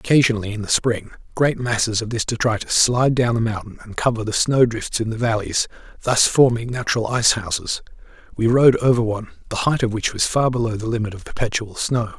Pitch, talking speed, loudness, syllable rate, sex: 115 Hz, 205 wpm, -20 LUFS, 6.0 syllables/s, male